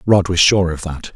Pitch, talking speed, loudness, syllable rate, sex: 90 Hz, 260 wpm, -15 LUFS, 4.9 syllables/s, male